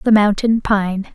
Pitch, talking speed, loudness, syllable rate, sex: 205 Hz, 155 wpm, -16 LUFS, 3.7 syllables/s, female